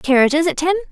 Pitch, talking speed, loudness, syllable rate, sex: 305 Hz, 195 wpm, -16 LUFS, 6.8 syllables/s, female